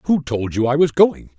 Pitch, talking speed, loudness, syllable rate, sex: 135 Hz, 260 wpm, -17 LUFS, 5.2 syllables/s, male